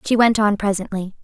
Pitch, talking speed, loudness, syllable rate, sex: 205 Hz, 195 wpm, -18 LUFS, 5.9 syllables/s, female